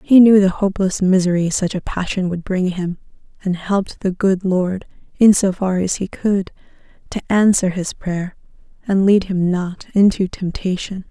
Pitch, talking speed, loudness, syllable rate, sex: 190 Hz, 175 wpm, -17 LUFS, 4.6 syllables/s, female